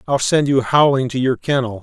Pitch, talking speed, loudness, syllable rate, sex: 130 Hz, 230 wpm, -16 LUFS, 5.4 syllables/s, male